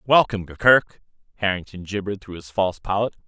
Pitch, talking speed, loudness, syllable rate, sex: 100 Hz, 145 wpm, -22 LUFS, 6.7 syllables/s, male